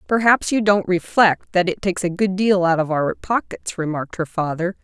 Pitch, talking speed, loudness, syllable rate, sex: 185 Hz, 210 wpm, -19 LUFS, 5.2 syllables/s, female